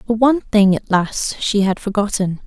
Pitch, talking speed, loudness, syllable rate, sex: 210 Hz, 145 wpm, -17 LUFS, 4.9 syllables/s, female